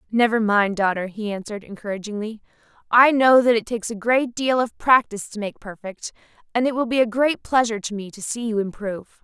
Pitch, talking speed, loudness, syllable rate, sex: 220 Hz, 210 wpm, -21 LUFS, 5.9 syllables/s, female